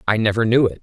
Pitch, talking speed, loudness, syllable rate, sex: 110 Hz, 290 wpm, -18 LUFS, 7.3 syllables/s, male